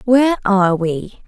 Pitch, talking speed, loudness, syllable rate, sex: 210 Hz, 140 wpm, -16 LUFS, 4.7 syllables/s, female